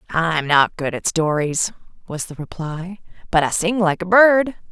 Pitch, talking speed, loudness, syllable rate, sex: 175 Hz, 180 wpm, -18 LUFS, 4.3 syllables/s, female